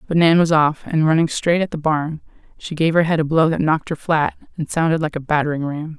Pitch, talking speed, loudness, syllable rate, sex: 160 Hz, 260 wpm, -18 LUFS, 6.0 syllables/s, female